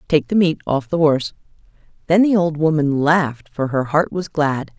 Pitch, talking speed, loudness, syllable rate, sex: 155 Hz, 200 wpm, -18 LUFS, 5.0 syllables/s, female